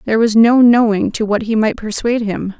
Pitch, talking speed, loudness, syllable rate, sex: 220 Hz, 230 wpm, -14 LUFS, 5.7 syllables/s, female